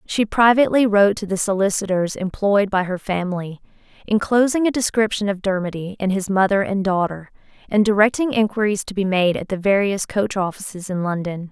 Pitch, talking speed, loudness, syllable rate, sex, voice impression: 200 Hz, 170 wpm, -19 LUFS, 5.6 syllables/s, female, feminine, slightly adult-like, slightly clear, slightly cute, friendly, slightly sweet, kind